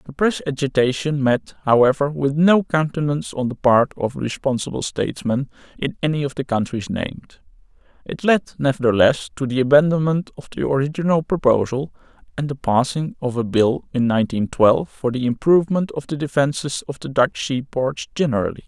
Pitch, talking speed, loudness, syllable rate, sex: 135 Hz, 165 wpm, -20 LUFS, 5.5 syllables/s, male